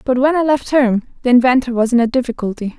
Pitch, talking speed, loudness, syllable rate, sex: 250 Hz, 235 wpm, -15 LUFS, 6.4 syllables/s, female